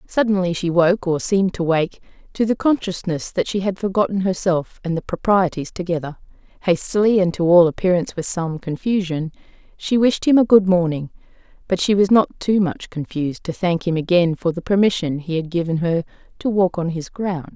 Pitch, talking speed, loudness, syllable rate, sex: 180 Hz, 190 wpm, -19 LUFS, 5.4 syllables/s, female